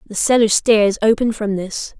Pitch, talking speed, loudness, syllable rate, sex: 215 Hz, 180 wpm, -16 LUFS, 5.1 syllables/s, female